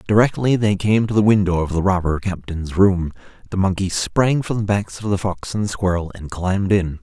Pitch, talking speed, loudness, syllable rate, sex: 95 Hz, 220 wpm, -19 LUFS, 5.3 syllables/s, male